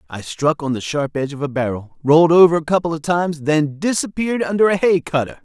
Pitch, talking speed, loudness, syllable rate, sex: 160 Hz, 230 wpm, -17 LUFS, 6.2 syllables/s, male